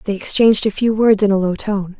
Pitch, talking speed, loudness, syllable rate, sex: 205 Hz, 270 wpm, -15 LUFS, 6.0 syllables/s, female